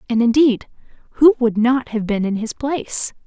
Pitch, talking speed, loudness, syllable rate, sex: 240 Hz, 185 wpm, -18 LUFS, 4.9 syllables/s, female